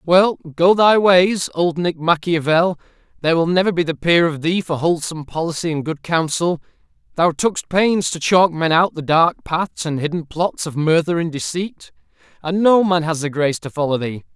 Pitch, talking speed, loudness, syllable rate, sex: 165 Hz, 195 wpm, -18 LUFS, 4.9 syllables/s, male